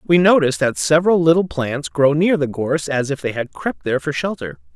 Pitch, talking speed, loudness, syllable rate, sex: 150 Hz, 225 wpm, -18 LUFS, 5.7 syllables/s, male